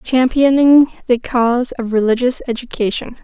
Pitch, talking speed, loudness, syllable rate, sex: 245 Hz, 110 wpm, -15 LUFS, 5.0 syllables/s, female